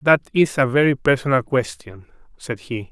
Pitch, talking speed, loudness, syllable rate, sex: 130 Hz, 165 wpm, -19 LUFS, 4.8 syllables/s, male